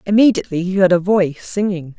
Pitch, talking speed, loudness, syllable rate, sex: 185 Hz, 180 wpm, -16 LUFS, 6.4 syllables/s, female